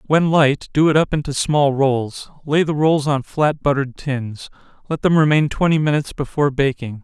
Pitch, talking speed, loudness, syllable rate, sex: 145 Hz, 170 wpm, -18 LUFS, 5.1 syllables/s, male